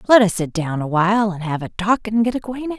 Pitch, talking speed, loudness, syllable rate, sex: 200 Hz, 280 wpm, -19 LUFS, 6.0 syllables/s, female